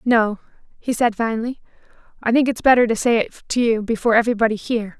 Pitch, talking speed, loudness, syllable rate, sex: 230 Hz, 190 wpm, -19 LUFS, 6.8 syllables/s, female